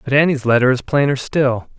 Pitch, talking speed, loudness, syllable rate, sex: 130 Hz, 200 wpm, -16 LUFS, 5.5 syllables/s, male